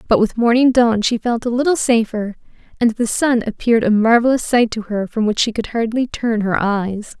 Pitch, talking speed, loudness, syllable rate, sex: 225 Hz, 215 wpm, -17 LUFS, 5.2 syllables/s, female